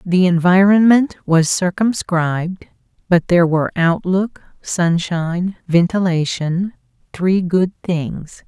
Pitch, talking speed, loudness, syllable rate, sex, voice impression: 175 Hz, 85 wpm, -16 LUFS, 3.7 syllables/s, female, very feminine, adult-like, slightly elegant